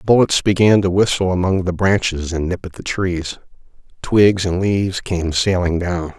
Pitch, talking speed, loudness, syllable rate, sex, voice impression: 90 Hz, 175 wpm, -17 LUFS, 4.6 syllables/s, male, very masculine, old, very thick, very tensed, very powerful, dark, very soft, very muffled, fluent, raspy, very cool, very intellectual, sincere, very calm, very mature, very friendly, very reassuring, very unique, very elegant, very wild, very sweet, lively, slightly strict, slightly modest